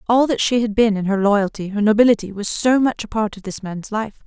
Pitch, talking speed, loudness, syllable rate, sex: 215 Hz, 265 wpm, -18 LUFS, 5.6 syllables/s, female